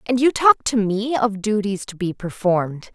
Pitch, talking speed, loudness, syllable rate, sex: 205 Hz, 205 wpm, -20 LUFS, 4.6 syllables/s, female